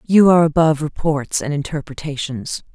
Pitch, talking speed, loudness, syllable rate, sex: 150 Hz, 130 wpm, -18 LUFS, 5.5 syllables/s, female